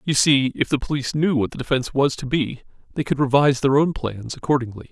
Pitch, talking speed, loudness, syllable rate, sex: 135 Hz, 230 wpm, -21 LUFS, 6.3 syllables/s, male